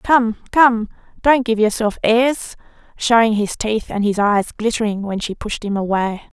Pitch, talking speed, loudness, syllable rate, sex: 220 Hz, 170 wpm, -18 LUFS, 4.4 syllables/s, female